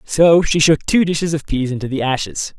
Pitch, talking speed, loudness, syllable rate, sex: 155 Hz, 230 wpm, -16 LUFS, 5.2 syllables/s, male